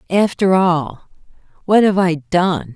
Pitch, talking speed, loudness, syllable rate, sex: 180 Hz, 130 wpm, -15 LUFS, 3.5 syllables/s, female